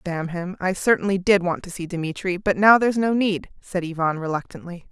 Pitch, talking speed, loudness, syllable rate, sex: 185 Hz, 210 wpm, -22 LUFS, 5.4 syllables/s, female